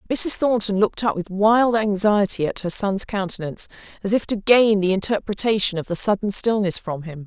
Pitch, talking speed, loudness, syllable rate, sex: 200 Hz, 180 wpm, -20 LUFS, 5.2 syllables/s, female